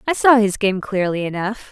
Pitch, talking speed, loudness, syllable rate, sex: 210 Hz, 210 wpm, -18 LUFS, 5.1 syllables/s, female